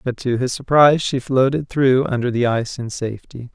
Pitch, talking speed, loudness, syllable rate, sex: 130 Hz, 205 wpm, -18 LUFS, 5.6 syllables/s, male